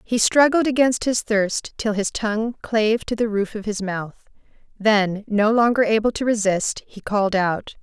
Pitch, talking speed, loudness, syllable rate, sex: 215 Hz, 185 wpm, -20 LUFS, 4.6 syllables/s, female